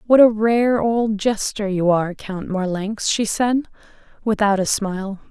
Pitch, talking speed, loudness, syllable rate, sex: 210 Hz, 160 wpm, -19 LUFS, 4.2 syllables/s, female